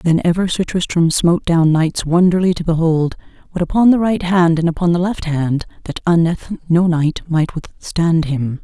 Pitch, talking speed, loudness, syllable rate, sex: 170 Hz, 190 wpm, -16 LUFS, 4.9 syllables/s, female